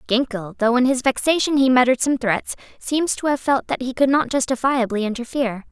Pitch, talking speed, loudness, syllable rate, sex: 255 Hz, 200 wpm, -20 LUFS, 5.7 syllables/s, female